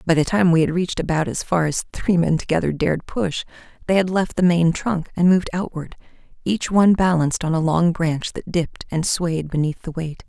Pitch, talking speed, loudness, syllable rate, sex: 165 Hz, 220 wpm, -20 LUFS, 5.6 syllables/s, female